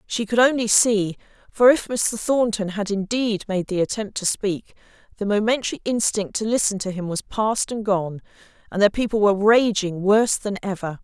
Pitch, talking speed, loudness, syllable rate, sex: 210 Hz, 185 wpm, -21 LUFS, 5.0 syllables/s, female